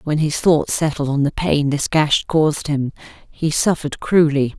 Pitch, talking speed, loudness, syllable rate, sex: 150 Hz, 185 wpm, -18 LUFS, 4.6 syllables/s, female